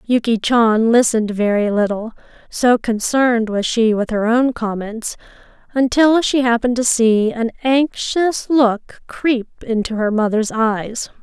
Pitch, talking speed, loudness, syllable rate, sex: 230 Hz, 140 wpm, -17 LUFS, 4.1 syllables/s, female